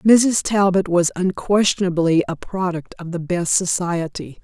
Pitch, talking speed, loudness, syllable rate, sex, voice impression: 180 Hz, 135 wpm, -19 LUFS, 4.2 syllables/s, female, feminine, slightly middle-aged, slightly soft, fluent, slightly raspy, slightly intellectual, slightly friendly, reassuring, elegant, slightly sharp